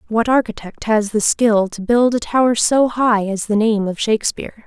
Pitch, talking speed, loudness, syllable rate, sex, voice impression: 220 Hz, 205 wpm, -16 LUFS, 4.9 syllables/s, female, slightly feminine, young, slightly fluent, cute, friendly, slightly kind